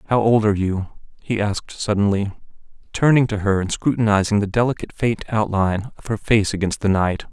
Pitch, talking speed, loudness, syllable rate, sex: 105 Hz, 180 wpm, -20 LUFS, 5.8 syllables/s, male